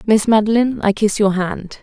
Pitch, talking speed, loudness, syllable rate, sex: 210 Hz, 195 wpm, -16 LUFS, 5.5 syllables/s, female